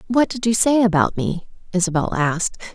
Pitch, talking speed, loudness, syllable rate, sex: 195 Hz, 175 wpm, -19 LUFS, 5.5 syllables/s, female